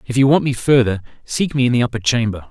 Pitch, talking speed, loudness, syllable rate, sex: 120 Hz, 265 wpm, -17 LUFS, 6.5 syllables/s, male